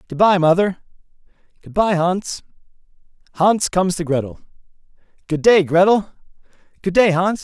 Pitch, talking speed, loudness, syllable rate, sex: 180 Hz, 115 wpm, -17 LUFS, 4.9 syllables/s, male